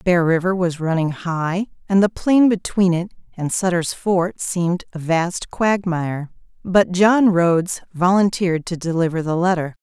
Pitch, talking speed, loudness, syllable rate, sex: 180 Hz, 155 wpm, -19 LUFS, 4.5 syllables/s, female